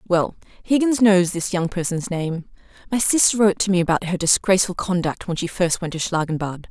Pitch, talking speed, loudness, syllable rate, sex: 180 Hz, 195 wpm, -20 LUFS, 5.7 syllables/s, female